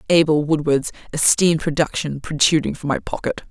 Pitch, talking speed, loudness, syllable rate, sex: 155 Hz, 135 wpm, -19 LUFS, 5.6 syllables/s, female